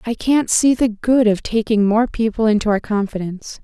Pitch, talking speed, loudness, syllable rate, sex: 220 Hz, 200 wpm, -17 LUFS, 5.1 syllables/s, female